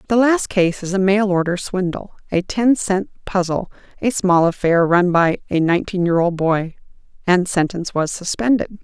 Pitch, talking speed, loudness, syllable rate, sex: 185 Hz, 170 wpm, -18 LUFS, 4.9 syllables/s, female